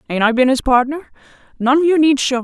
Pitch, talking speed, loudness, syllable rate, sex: 270 Hz, 245 wpm, -15 LUFS, 6.4 syllables/s, female